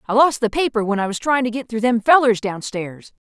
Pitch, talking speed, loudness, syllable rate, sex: 230 Hz, 255 wpm, -18 LUFS, 5.7 syllables/s, female